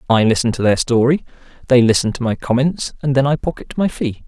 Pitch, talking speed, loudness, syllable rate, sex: 130 Hz, 225 wpm, -17 LUFS, 5.9 syllables/s, male